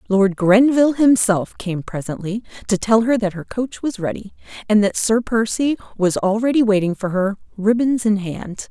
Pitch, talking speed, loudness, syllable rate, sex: 210 Hz, 165 wpm, -18 LUFS, 4.8 syllables/s, female